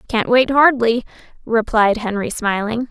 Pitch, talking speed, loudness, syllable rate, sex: 230 Hz, 125 wpm, -16 LUFS, 4.3 syllables/s, female